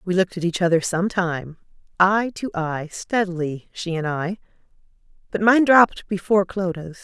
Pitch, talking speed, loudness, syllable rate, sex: 185 Hz, 155 wpm, -21 LUFS, 5.0 syllables/s, female